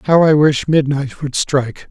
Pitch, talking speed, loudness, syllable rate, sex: 145 Hz, 190 wpm, -15 LUFS, 4.3 syllables/s, male